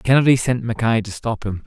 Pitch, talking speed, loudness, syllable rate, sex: 115 Hz, 215 wpm, -19 LUFS, 5.6 syllables/s, male